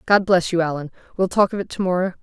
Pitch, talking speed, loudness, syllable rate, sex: 180 Hz, 270 wpm, -20 LUFS, 6.7 syllables/s, female